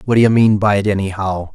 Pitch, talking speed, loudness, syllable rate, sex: 100 Hz, 235 wpm, -15 LUFS, 5.7 syllables/s, male